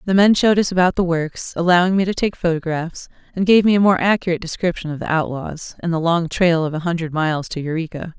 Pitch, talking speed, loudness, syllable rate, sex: 175 Hz, 235 wpm, -18 LUFS, 6.2 syllables/s, female